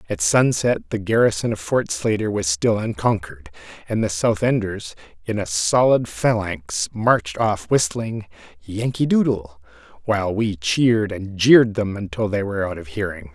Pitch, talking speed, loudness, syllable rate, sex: 110 Hz, 155 wpm, -20 LUFS, 4.8 syllables/s, male